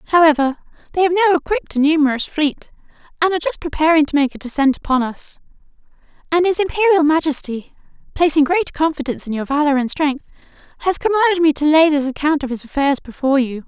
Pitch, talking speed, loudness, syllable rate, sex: 305 Hz, 185 wpm, -17 LUFS, 6.4 syllables/s, female